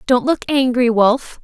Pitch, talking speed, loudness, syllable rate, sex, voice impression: 250 Hz, 165 wpm, -16 LUFS, 3.8 syllables/s, female, very feminine, very young, very thin, very tensed, powerful, very bright, hard, very clear, very fluent, very cute, slightly cool, intellectual, very refreshing, sincere, slightly calm, very friendly, very reassuring, very unique, elegant, wild, sweet, very lively, strict, intense, sharp, slightly light